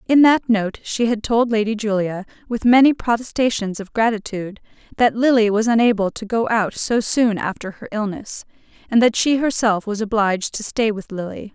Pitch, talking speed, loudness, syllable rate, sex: 220 Hz, 180 wpm, -19 LUFS, 5.0 syllables/s, female